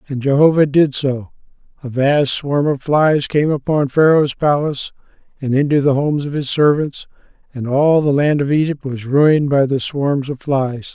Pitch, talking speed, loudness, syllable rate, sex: 140 Hz, 180 wpm, -16 LUFS, 4.7 syllables/s, male